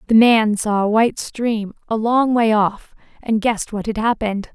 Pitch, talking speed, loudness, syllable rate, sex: 220 Hz, 200 wpm, -18 LUFS, 4.9 syllables/s, female